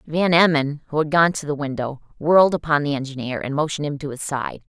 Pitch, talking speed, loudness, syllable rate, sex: 150 Hz, 225 wpm, -21 LUFS, 6.1 syllables/s, female